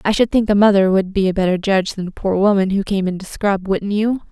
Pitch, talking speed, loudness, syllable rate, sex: 195 Hz, 290 wpm, -17 LUFS, 6.0 syllables/s, female